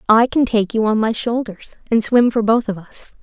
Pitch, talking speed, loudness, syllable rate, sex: 225 Hz, 240 wpm, -17 LUFS, 4.8 syllables/s, female